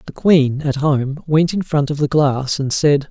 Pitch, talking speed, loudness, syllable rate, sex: 145 Hz, 230 wpm, -17 LUFS, 4.1 syllables/s, male